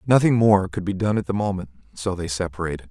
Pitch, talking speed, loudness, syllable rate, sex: 95 Hz, 225 wpm, -22 LUFS, 6.3 syllables/s, male